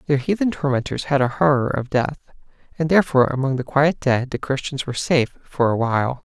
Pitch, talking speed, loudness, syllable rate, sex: 135 Hz, 200 wpm, -20 LUFS, 6.1 syllables/s, male